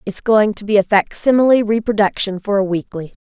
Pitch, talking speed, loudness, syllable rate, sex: 205 Hz, 185 wpm, -16 LUFS, 5.6 syllables/s, female